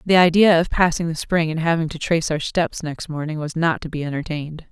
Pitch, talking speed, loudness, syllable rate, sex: 160 Hz, 240 wpm, -20 LUFS, 5.9 syllables/s, female